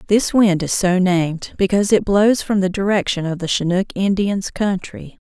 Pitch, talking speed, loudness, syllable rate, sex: 190 Hz, 180 wpm, -18 LUFS, 4.9 syllables/s, female